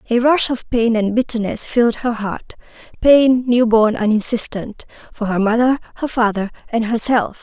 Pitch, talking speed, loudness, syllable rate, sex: 230 Hz, 160 wpm, -17 LUFS, 4.8 syllables/s, female